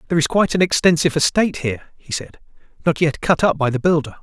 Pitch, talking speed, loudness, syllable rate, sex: 160 Hz, 225 wpm, -18 LUFS, 7.4 syllables/s, male